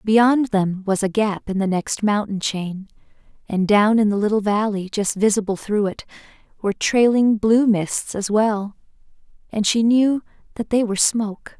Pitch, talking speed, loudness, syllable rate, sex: 210 Hz, 170 wpm, -19 LUFS, 4.5 syllables/s, female